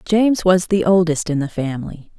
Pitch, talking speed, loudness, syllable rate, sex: 175 Hz, 195 wpm, -17 LUFS, 5.4 syllables/s, female